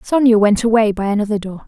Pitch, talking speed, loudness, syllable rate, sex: 215 Hz, 215 wpm, -15 LUFS, 6.4 syllables/s, female